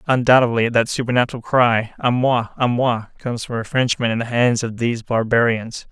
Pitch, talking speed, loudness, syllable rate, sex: 120 Hz, 180 wpm, -18 LUFS, 5.5 syllables/s, male